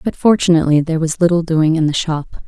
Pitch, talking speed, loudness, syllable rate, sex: 165 Hz, 220 wpm, -15 LUFS, 6.4 syllables/s, female